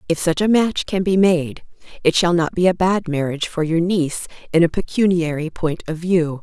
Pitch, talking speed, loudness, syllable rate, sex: 170 Hz, 215 wpm, -19 LUFS, 5.2 syllables/s, female